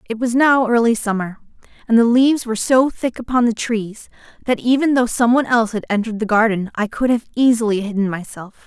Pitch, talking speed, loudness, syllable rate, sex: 230 Hz, 210 wpm, -17 LUFS, 6.0 syllables/s, female